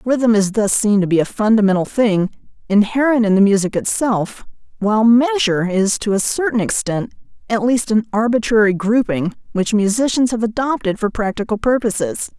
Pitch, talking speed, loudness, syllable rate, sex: 215 Hz, 160 wpm, -16 LUFS, 5.2 syllables/s, female